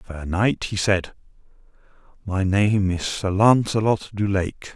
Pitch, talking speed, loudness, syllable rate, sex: 100 Hz, 140 wpm, -21 LUFS, 3.6 syllables/s, male